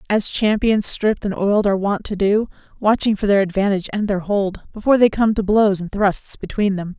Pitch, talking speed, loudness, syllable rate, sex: 205 Hz, 215 wpm, -18 LUFS, 5.6 syllables/s, female